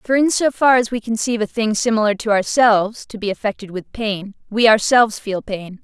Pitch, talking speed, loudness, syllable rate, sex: 220 Hz, 215 wpm, -17 LUFS, 5.6 syllables/s, female